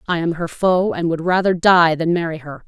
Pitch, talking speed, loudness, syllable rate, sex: 170 Hz, 245 wpm, -17 LUFS, 5.2 syllables/s, female